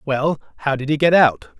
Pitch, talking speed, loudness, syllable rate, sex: 145 Hz, 225 wpm, -18 LUFS, 5.4 syllables/s, male